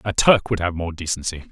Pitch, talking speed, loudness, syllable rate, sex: 90 Hz, 240 wpm, -20 LUFS, 5.9 syllables/s, male